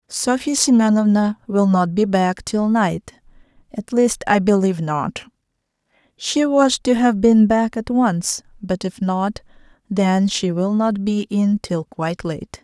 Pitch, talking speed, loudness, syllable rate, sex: 205 Hz, 155 wpm, -18 LUFS, 3.9 syllables/s, female